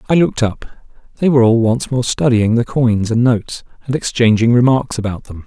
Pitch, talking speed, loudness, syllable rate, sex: 120 Hz, 200 wpm, -15 LUFS, 5.5 syllables/s, male